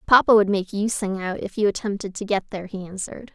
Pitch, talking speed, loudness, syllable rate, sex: 200 Hz, 250 wpm, -23 LUFS, 6.3 syllables/s, female